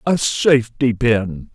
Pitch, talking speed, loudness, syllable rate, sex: 120 Hz, 115 wpm, -17 LUFS, 3.6 syllables/s, male